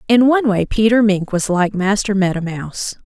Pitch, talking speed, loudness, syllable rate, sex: 205 Hz, 195 wpm, -16 LUFS, 5.3 syllables/s, female